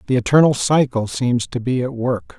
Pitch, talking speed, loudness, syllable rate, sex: 125 Hz, 200 wpm, -18 LUFS, 5.0 syllables/s, male